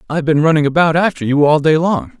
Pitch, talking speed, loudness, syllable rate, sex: 155 Hz, 245 wpm, -13 LUFS, 6.6 syllables/s, male